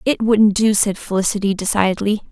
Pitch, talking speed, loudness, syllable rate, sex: 205 Hz, 155 wpm, -17 LUFS, 5.7 syllables/s, female